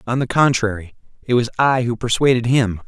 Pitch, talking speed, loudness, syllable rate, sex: 120 Hz, 190 wpm, -18 LUFS, 5.5 syllables/s, male